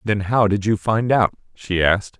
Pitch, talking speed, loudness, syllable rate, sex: 100 Hz, 220 wpm, -19 LUFS, 4.9 syllables/s, male